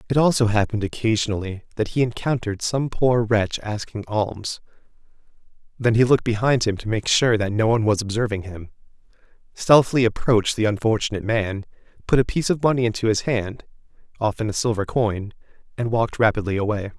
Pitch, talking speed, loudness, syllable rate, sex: 110 Hz, 165 wpm, -21 LUFS, 6.1 syllables/s, male